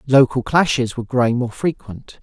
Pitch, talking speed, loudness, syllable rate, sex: 125 Hz, 160 wpm, -18 LUFS, 5.3 syllables/s, male